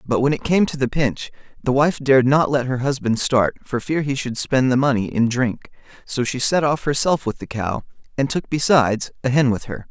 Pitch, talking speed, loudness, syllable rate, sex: 130 Hz, 235 wpm, -19 LUFS, 5.3 syllables/s, male